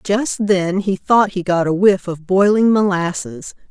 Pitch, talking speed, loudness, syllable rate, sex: 190 Hz, 180 wpm, -16 LUFS, 4.0 syllables/s, female